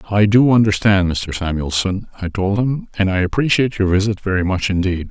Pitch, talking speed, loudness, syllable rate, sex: 100 Hz, 190 wpm, -17 LUFS, 5.6 syllables/s, male